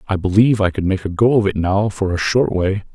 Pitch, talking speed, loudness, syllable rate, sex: 100 Hz, 285 wpm, -17 LUFS, 5.9 syllables/s, male